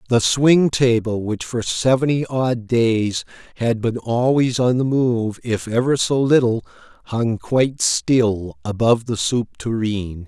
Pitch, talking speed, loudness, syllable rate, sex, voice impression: 120 Hz, 145 wpm, -19 LUFS, 3.9 syllables/s, male, very masculine, middle-aged, very thick, slightly relaxed, powerful, slightly dark, slightly hard, clear, fluent, cool, slightly intellectual, refreshing, very sincere, calm, very mature, slightly friendly, slightly reassuring, unique, slightly elegant, wild, slightly sweet, slightly lively, kind, slightly modest